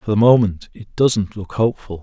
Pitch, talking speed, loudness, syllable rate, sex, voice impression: 105 Hz, 205 wpm, -17 LUFS, 5.3 syllables/s, male, very masculine, very adult-like, slightly old, very thick, relaxed, weak, slightly dark, slightly soft, slightly muffled, fluent, slightly raspy, cool, very intellectual, slightly refreshing, sincere, calm, friendly, reassuring, unique, slightly elegant, wild, slightly sweet, slightly lively, kind, modest